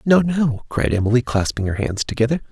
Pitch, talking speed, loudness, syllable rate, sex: 125 Hz, 190 wpm, -20 LUFS, 5.6 syllables/s, male